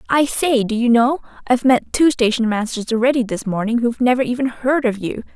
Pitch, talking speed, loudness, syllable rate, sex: 240 Hz, 215 wpm, -18 LUFS, 5.8 syllables/s, female